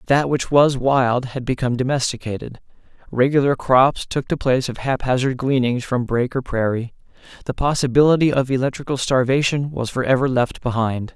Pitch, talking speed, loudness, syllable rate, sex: 130 Hz, 150 wpm, -19 LUFS, 5.4 syllables/s, male